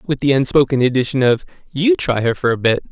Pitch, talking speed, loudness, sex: 135 Hz, 225 wpm, -16 LUFS, male